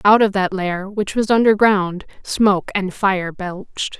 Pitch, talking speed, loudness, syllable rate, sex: 195 Hz, 165 wpm, -18 LUFS, 4.1 syllables/s, female